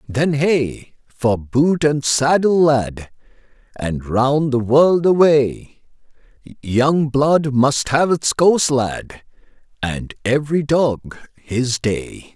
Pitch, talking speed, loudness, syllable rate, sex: 135 Hz, 115 wpm, -17 LUFS, 2.9 syllables/s, male